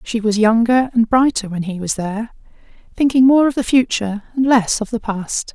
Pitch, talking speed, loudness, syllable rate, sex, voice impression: 230 Hz, 205 wpm, -16 LUFS, 5.3 syllables/s, female, very feminine, very adult-like, thin, slightly tensed, slightly weak, dark, slightly soft, very clear, fluent, slightly raspy, cute, slightly cool, intellectual, very refreshing, sincere, calm, friendly, very reassuring, unique, very elegant, slightly wild, sweet, lively, kind, slightly intense, slightly sharp, slightly modest, light